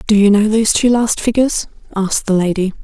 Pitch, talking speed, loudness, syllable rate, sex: 210 Hz, 210 wpm, -14 LUFS, 6.4 syllables/s, female